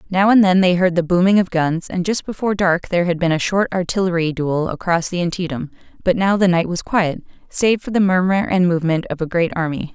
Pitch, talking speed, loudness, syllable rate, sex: 180 Hz, 235 wpm, -18 LUFS, 5.8 syllables/s, female